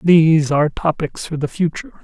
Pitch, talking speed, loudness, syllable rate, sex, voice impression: 160 Hz, 175 wpm, -17 LUFS, 6.0 syllables/s, female, feminine, adult-like, slightly muffled, slightly intellectual, calm, slightly sweet